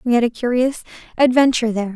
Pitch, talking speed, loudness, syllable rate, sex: 240 Hz, 185 wpm, -17 LUFS, 7.5 syllables/s, female